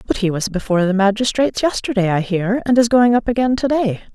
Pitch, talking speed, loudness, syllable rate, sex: 215 Hz, 230 wpm, -17 LUFS, 6.2 syllables/s, female